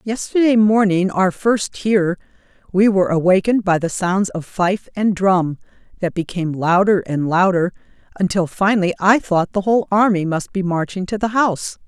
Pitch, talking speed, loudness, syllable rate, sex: 190 Hz, 155 wpm, -17 LUFS, 5.1 syllables/s, female